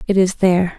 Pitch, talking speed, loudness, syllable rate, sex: 185 Hz, 230 wpm, -16 LUFS, 6.4 syllables/s, female